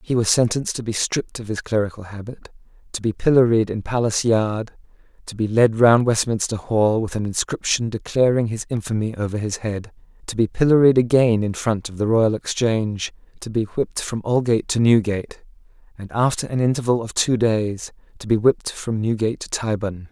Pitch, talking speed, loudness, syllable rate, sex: 110 Hz, 185 wpm, -20 LUFS, 5.6 syllables/s, male